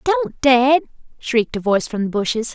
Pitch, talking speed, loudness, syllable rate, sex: 230 Hz, 190 wpm, -18 LUFS, 5.3 syllables/s, female